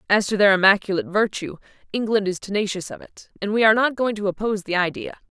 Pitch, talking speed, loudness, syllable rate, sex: 200 Hz, 215 wpm, -21 LUFS, 6.7 syllables/s, female